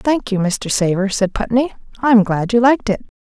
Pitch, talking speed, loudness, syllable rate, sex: 215 Hz, 205 wpm, -16 LUFS, 5.0 syllables/s, female